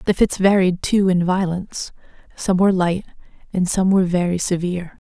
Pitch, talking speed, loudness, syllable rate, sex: 185 Hz, 165 wpm, -19 LUFS, 5.5 syllables/s, female